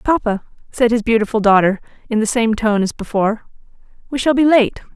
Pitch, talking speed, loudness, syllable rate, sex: 225 Hz, 180 wpm, -16 LUFS, 5.9 syllables/s, female